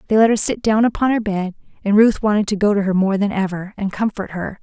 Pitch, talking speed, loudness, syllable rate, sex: 205 Hz, 270 wpm, -18 LUFS, 6.1 syllables/s, female